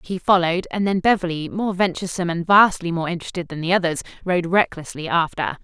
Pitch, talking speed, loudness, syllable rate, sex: 175 Hz, 180 wpm, -20 LUFS, 6.3 syllables/s, female